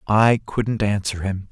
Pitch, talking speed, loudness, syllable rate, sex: 100 Hz, 160 wpm, -21 LUFS, 3.8 syllables/s, male